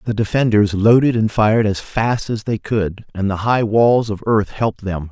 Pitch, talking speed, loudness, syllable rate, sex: 105 Hz, 210 wpm, -17 LUFS, 4.7 syllables/s, male